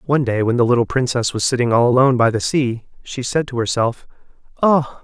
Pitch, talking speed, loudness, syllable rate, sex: 125 Hz, 215 wpm, -17 LUFS, 5.8 syllables/s, male